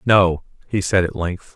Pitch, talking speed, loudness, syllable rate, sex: 95 Hz, 195 wpm, -20 LUFS, 4.2 syllables/s, male